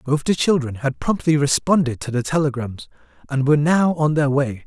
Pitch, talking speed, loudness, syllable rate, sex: 140 Hz, 195 wpm, -19 LUFS, 5.3 syllables/s, male